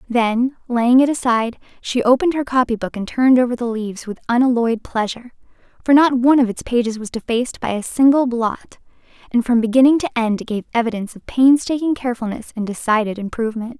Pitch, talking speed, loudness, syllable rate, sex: 240 Hz, 185 wpm, -18 LUFS, 6.3 syllables/s, female